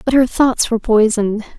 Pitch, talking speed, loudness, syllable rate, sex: 230 Hz, 190 wpm, -15 LUFS, 5.9 syllables/s, female